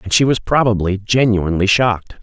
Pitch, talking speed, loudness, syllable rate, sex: 105 Hz, 160 wpm, -15 LUFS, 5.6 syllables/s, male